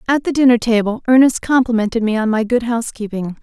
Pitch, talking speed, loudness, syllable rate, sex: 235 Hz, 195 wpm, -15 LUFS, 6.2 syllables/s, female